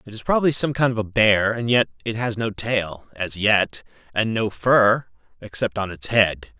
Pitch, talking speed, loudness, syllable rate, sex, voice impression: 110 Hz, 190 wpm, -21 LUFS, 4.7 syllables/s, male, masculine, adult-like, slightly fluent, slightly refreshing, sincere, friendly